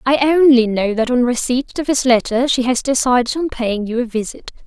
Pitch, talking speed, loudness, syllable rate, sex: 250 Hz, 220 wpm, -16 LUFS, 5.2 syllables/s, female